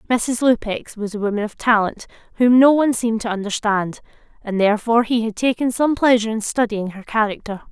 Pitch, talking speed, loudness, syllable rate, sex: 225 Hz, 185 wpm, -19 LUFS, 6.0 syllables/s, female